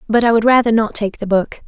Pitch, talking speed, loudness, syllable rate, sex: 220 Hz, 285 wpm, -15 LUFS, 6.0 syllables/s, female